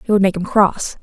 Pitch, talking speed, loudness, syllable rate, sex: 195 Hz, 295 wpm, -16 LUFS, 5.6 syllables/s, female